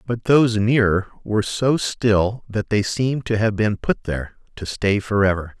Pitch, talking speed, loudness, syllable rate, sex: 105 Hz, 180 wpm, -20 LUFS, 4.7 syllables/s, male